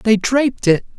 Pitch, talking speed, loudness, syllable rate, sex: 225 Hz, 185 wpm, -16 LUFS, 5.3 syllables/s, male